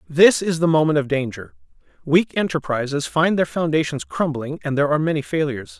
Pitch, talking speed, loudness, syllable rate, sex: 145 Hz, 175 wpm, -20 LUFS, 5.9 syllables/s, male